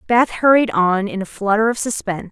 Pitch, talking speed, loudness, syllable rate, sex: 215 Hz, 210 wpm, -17 LUFS, 5.6 syllables/s, female